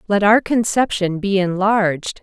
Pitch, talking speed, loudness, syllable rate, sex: 200 Hz, 135 wpm, -17 LUFS, 4.4 syllables/s, female